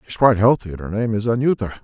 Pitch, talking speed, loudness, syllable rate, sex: 110 Hz, 295 wpm, -19 LUFS, 7.9 syllables/s, male